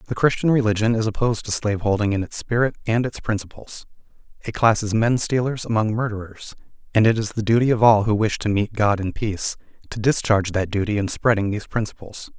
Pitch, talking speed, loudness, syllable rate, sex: 110 Hz, 195 wpm, -21 LUFS, 6.2 syllables/s, male